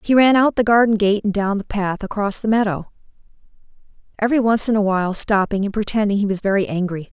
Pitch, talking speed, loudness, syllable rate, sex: 205 Hz, 210 wpm, -18 LUFS, 6.2 syllables/s, female